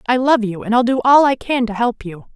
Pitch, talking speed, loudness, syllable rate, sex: 240 Hz, 305 wpm, -16 LUFS, 5.6 syllables/s, female